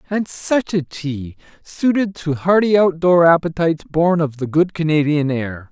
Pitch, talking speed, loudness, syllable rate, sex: 165 Hz, 155 wpm, -17 LUFS, 4.4 syllables/s, male